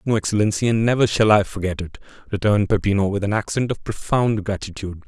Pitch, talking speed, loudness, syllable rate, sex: 105 Hz, 190 wpm, -20 LUFS, 6.5 syllables/s, male